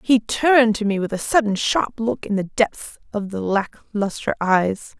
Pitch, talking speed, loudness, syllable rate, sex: 215 Hz, 205 wpm, -20 LUFS, 4.5 syllables/s, female